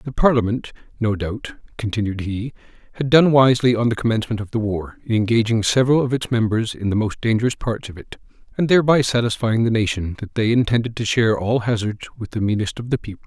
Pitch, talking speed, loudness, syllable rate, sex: 115 Hz, 210 wpm, -20 LUFS, 6.3 syllables/s, male